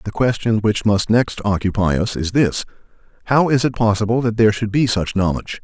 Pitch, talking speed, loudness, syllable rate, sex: 110 Hz, 200 wpm, -18 LUFS, 5.6 syllables/s, male